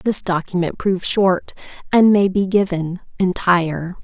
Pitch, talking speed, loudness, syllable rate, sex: 185 Hz, 135 wpm, -18 LUFS, 4.5 syllables/s, female